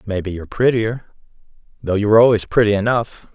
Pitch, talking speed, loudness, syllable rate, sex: 110 Hz, 145 wpm, -17 LUFS, 6.4 syllables/s, male